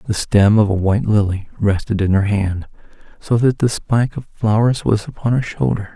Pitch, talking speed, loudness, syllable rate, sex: 105 Hz, 200 wpm, -17 LUFS, 5.1 syllables/s, male